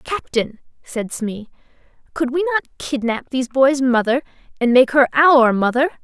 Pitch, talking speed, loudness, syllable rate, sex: 265 Hz, 150 wpm, -17 LUFS, 4.9 syllables/s, female